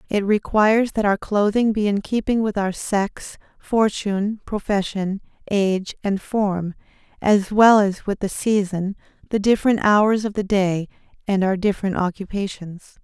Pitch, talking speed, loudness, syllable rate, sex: 200 Hz, 145 wpm, -20 LUFS, 4.5 syllables/s, female